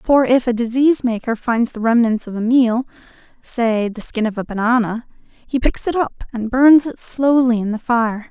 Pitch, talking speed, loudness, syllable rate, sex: 240 Hz, 200 wpm, -17 LUFS, 4.9 syllables/s, female